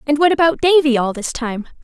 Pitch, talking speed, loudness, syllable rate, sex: 275 Hz, 230 wpm, -16 LUFS, 5.7 syllables/s, female